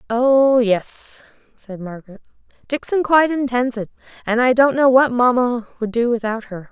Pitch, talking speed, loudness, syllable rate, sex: 240 Hz, 160 wpm, -17 LUFS, 4.8 syllables/s, female